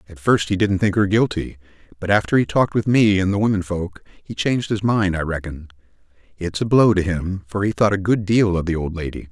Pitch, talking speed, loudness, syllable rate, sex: 95 Hz, 245 wpm, -19 LUFS, 5.7 syllables/s, male